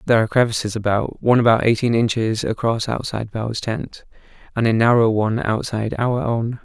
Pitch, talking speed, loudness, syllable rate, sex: 115 Hz, 170 wpm, -19 LUFS, 6.2 syllables/s, male